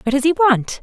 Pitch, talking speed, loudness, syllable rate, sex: 285 Hz, 290 wpm, -16 LUFS, 5.6 syllables/s, female